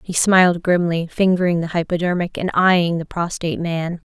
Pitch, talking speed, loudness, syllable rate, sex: 175 Hz, 160 wpm, -18 LUFS, 5.2 syllables/s, female